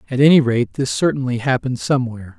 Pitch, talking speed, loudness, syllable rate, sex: 130 Hz, 175 wpm, -17 LUFS, 6.9 syllables/s, male